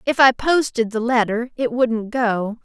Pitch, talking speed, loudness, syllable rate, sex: 235 Hz, 180 wpm, -19 LUFS, 4.1 syllables/s, female